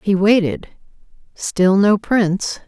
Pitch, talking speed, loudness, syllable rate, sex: 200 Hz, 110 wpm, -16 LUFS, 3.6 syllables/s, female